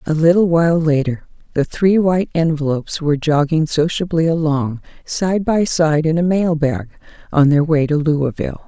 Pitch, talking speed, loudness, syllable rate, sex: 160 Hz, 165 wpm, -16 LUFS, 5.1 syllables/s, female